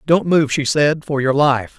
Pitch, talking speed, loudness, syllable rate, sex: 145 Hz, 235 wpm, -16 LUFS, 4.2 syllables/s, male